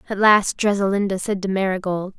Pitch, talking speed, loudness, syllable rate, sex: 195 Hz, 165 wpm, -20 LUFS, 5.6 syllables/s, female